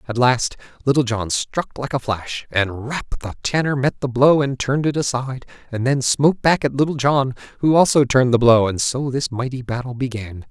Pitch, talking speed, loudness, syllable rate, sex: 130 Hz, 200 wpm, -19 LUFS, 5.3 syllables/s, male